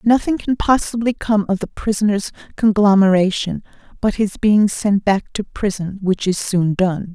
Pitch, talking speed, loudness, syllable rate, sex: 200 Hz, 160 wpm, -17 LUFS, 4.5 syllables/s, female